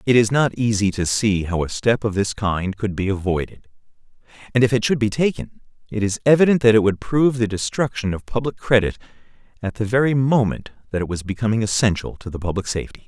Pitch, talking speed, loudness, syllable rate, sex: 110 Hz, 210 wpm, -20 LUFS, 6.0 syllables/s, male